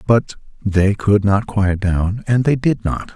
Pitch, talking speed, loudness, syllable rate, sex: 105 Hz, 190 wpm, -17 LUFS, 3.7 syllables/s, male